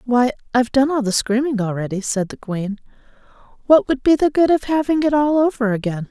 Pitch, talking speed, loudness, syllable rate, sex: 250 Hz, 205 wpm, -18 LUFS, 5.8 syllables/s, female